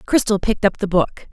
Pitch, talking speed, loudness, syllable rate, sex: 205 Hz, 225 wpm, -19 LUFS, 5.9 syllables/s, female